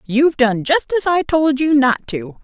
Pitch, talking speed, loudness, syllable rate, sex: 265 Hz, 220 wpm, -16 LUFS, 4.8 syllables/s, female